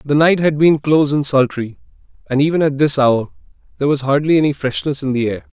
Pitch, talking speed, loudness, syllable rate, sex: 145 Hz, 215 wpm, -16 LUFS, 6.1 syllables/s, male